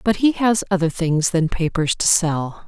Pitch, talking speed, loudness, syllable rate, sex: 175 Hz, 200 wpm, -19 LUFS, 4.3 syllables/s, female